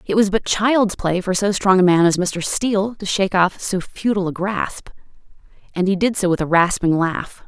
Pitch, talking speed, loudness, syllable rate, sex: 190 Hz, 225 wpm, -18 LUFS, 5.1 syllables/s, female